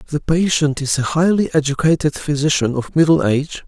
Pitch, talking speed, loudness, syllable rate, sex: 150 Hz, 165 wpm, -17 LUFS, 5.3 syllables/s, male